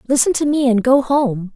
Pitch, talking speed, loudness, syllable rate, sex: 255 Hz, 230 wpm, -16 LUFS, 5.1 syllables/s, female